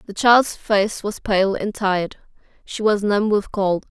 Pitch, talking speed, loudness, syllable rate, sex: 205 Hz, 180 wpm, -19 LUFS, 4.0 syllables/s, female